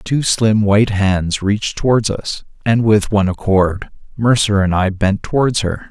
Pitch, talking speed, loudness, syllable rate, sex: 105 Hz, 175 wpm, -15 LUFS, 4.5 syllables/s, male